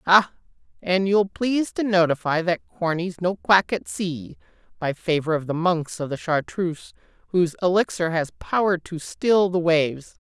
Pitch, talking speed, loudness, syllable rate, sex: 175 Hz, 165 wpm, -22 LUFS, 4.7 syllables/s, female